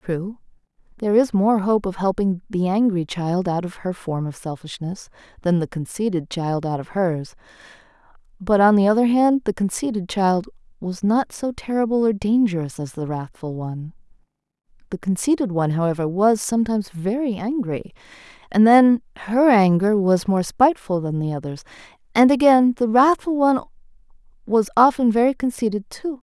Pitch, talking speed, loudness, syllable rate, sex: 205 Hz, 155 wpm, -20 LUFS, 5.2 syllables/s, female